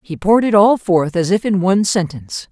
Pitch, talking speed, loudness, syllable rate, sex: 190 Hz, 240 wpm, -15 LUFS, 5.8 syllables/s, female